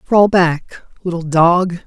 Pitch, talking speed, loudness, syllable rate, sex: 175 Hz, 130 wpm, -14 LUFS, 3.2 syllables/s, male